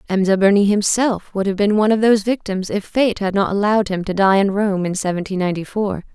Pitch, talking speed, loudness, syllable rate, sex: 200 Hz, 245 wpm, -18 LUFS, 6.1 syllables/s, female